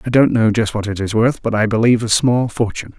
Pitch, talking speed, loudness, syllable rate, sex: 110 Hz, 280 wpm, -16 LUFS, 6.3 syllables/s, male